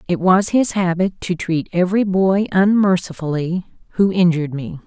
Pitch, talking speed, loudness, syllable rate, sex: 180 Hz, 150 wpm, -17 LUFS, 5.1 syllables/s, female